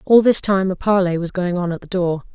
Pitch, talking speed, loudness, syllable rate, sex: 185 Hz, 280 wpm, -18 LUFS, 5.6 syllables/s, female